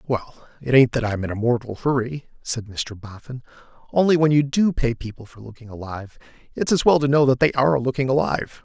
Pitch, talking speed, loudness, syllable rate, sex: 125 Hz, 215 wpm, -21 LUFS, 5.8 syllables/s, male